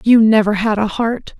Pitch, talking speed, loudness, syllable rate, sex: 220 Hz, 215 wpm, -15 LUFS, 4.7 syllables/s, female